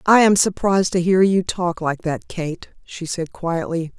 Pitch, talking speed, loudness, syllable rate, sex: 175 Hz, 195 wpm, -19 LUFS, 4.3 syllables/s, female